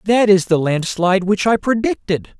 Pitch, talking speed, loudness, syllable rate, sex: 195 Hz, 175 wpm, -16 LUFS, 4.9 syllables/s, male